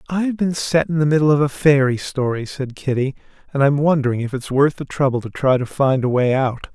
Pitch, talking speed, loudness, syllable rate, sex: 140 Hz, 240 wpm, -18 LUFS, 5.7 syllables/s, male